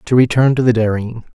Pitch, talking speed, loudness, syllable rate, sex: 120 Hz, 225 wpm, -14 LUFS, 5.9 syllables/s, male